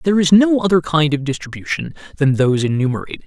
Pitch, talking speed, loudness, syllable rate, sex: 155 Hz, 185 wpm, -16 LUFS, 6.8 syllables/s, male